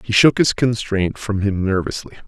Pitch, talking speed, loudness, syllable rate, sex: 105 Hz, 185 wpm, -18 LUFS, 4.8 syllables/s, male